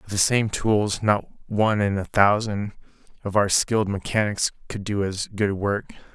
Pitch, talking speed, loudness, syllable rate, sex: 105 Hz, 175 wpm, -23 LUFS, 4.6 syllables/s, male